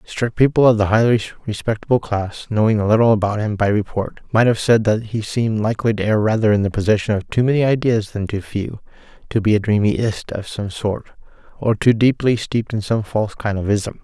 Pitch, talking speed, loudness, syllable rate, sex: 110 Hz, 220 wpm, -18 LUFS, 5.8 syllables/s, male